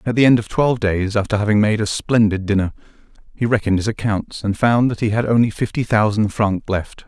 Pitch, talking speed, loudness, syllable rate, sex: 105 Hz, 220 wpm, -18 LUFS, 5.9 syllables/s, male